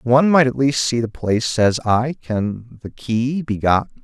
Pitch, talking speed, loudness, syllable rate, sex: 120 Hz, 210 wpm, -18 LUFS, 4.4 syllables/s, male